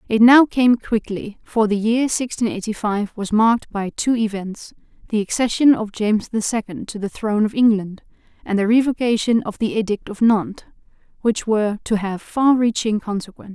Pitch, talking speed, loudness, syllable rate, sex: 220 Hz, 175 wpm, -19 LUFS, 5.2 syllables/s, female